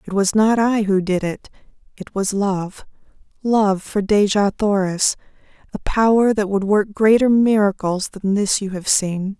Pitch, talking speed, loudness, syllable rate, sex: 205 Hz, 165 wpm, -18 LUFS, 4.2 syllables/s, female